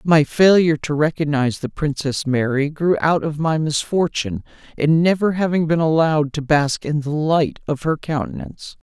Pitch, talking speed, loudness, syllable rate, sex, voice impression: 150 Hz, 170 wpm, -19 LUFS, 5.1 syllables/s, male, masculine, adult-like, slightly thick, tensed, powerful, slightly hard, clear, intellectual, slightly friendly, wild, lively, slightly strict, slightly intense